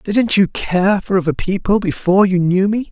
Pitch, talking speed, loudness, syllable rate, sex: 195 Hz, 205 wpm, -15 LUFS, 4.9 syllables/s, male